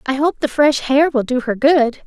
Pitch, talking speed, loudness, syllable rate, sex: 275 Hz, 260 wpm, -16 LUFS, 4.8 syllables/s, female